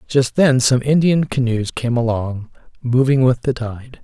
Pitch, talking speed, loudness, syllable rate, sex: 125 Hz, 165 wpm, -17 LUFS, 4.3 syllables/s, male